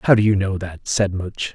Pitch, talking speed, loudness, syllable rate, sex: 95 Hz, 270 wpm, -20 LUFS, 5.2 syllables/s, male